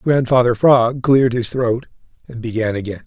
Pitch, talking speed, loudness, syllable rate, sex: 120 Hz, 155 wpm, -16 LUFS, 5.0 syllables/s, male